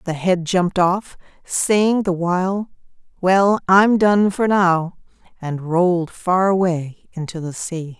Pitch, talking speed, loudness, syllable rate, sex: 180 Hz, 145 wpm, -18 LUFS, 3.7 syllables/s, female